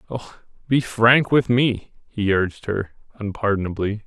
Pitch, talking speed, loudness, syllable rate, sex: 110 Hz, 135 wpm, -20 LUFS, 4.3 syllables/s, male